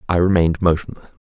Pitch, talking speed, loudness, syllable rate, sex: 85 Hz, 145 wpm, -17 LUFS, 7.4 syllables/s, male